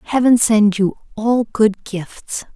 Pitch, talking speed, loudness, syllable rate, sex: 220 Hz, 140 wpm, -16 LUFS, 3.2 syllables/s, female